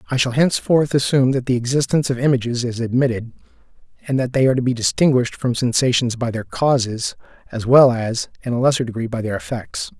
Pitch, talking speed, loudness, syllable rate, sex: 125 Hz, 200 wpm, -19 LUFS, 6.4 syllables/s, male